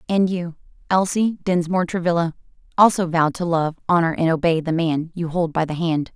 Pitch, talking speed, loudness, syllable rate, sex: 170 Hz, 185 wpm, -20 LUFS, 5.6 syllables/s, female